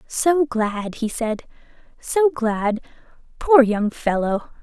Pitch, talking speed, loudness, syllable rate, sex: 245 Hz, 115 wpm, -20 LUFS, 3.0 syllables/s, female